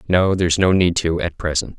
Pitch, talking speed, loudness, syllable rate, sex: 90 Hz, 235 wpm, -18 LUFS, 5.6 syllables/s, male